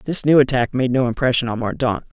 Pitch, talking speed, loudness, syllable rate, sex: 130 Hz, 220 wpm, -18 LUFS, 6.2 syllables/s, male